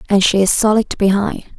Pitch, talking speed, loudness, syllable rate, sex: 200 Hz, 190 wpm, -15 LUFS, 5.4 syllables/s, female